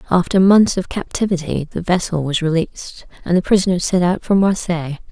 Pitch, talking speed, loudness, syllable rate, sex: 175 Hz, 175 wpm, -17 LUFS, 5.8 syllables/s, female